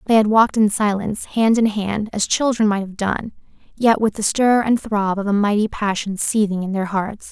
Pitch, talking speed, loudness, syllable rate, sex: 210 Hz, 220 wpm, -19 LUFS, 5.1 syllables/s, female